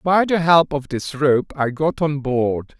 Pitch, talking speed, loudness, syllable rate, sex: 145 Hz, 215 wpm, -19 LUFS, 3.7 syllables/s, male